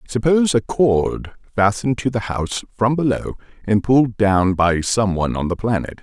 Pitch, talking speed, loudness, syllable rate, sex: 110 Hz, 180 wpm, -18 LUFS, 5.2 syllables/s, male